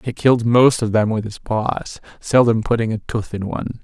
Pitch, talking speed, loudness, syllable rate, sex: 115 Hz, 220 wpm, -18 LUFS, 5.3 syllables/s, male